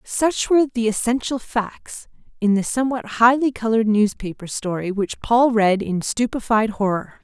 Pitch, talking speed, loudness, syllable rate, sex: 225 Hz, 150 wpm, -20 LUFS, 4.8 syllables/s, female